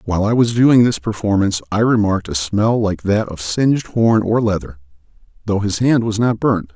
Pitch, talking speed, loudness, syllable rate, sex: 105 Hz, 205 wpm, -16 LUFS, 5.5 syllables/s, male